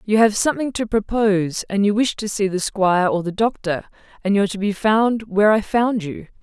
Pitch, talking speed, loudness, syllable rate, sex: 205 Hz, 225 wpm, -19 LUFS, 5.6 syllables/s, female